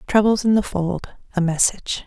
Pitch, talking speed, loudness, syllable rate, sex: 190 Hz, 145 wpm, -20 LUFS, 5.1 syllables/s, female